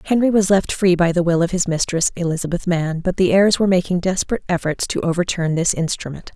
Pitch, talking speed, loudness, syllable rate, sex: 175 Hz, 215 wpm, -18 LUFS, 5.8 syllables/s, female